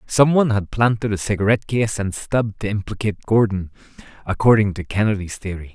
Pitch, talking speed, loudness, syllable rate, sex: 105 Hz, 165 wpm, -20 LUFS, 5.9 syllables/s, male